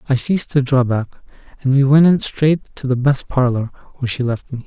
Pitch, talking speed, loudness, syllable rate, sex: 135 Hz, 220 wpm, -17 LUFS, 5.5 syllables/s, male